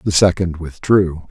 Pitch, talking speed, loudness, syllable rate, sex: 90 Hz, 140 wpm, -16 LUFS, 4.2 syllables/s, male